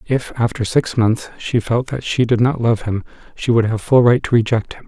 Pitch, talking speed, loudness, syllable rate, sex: 120 Hz, 245 wpm, -17 LUFS, 5.1 syllables/s, male